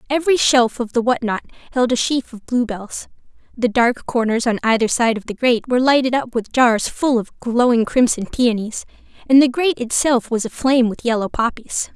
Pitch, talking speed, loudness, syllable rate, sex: 240 Hz, 195 wpm, -18 LUFS, 5.4 syllables/s, female